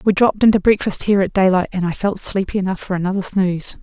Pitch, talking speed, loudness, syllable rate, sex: 190 Hz, 250 wpm, -17 LUFS, 6.8 syllables/s, female